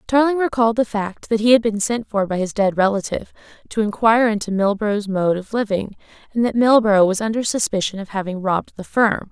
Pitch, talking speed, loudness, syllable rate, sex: 215 Hz, 205 wpm, -19 LUFS, 5.8 syllables/s, female